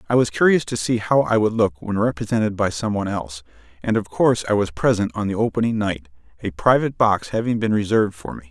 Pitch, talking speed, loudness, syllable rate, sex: 105 Hz, 235 wpm, -20 LUFS, 6.4 syllables/s, male